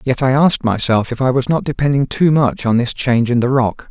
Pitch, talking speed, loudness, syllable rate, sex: 130 Hz, 260 wpm, -15 LUFS, 5.8 syllables/s, male